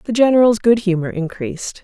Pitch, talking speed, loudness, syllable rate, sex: 205 Hz, 165 wpm, -16 LUFS, 5.9 syllables/s, female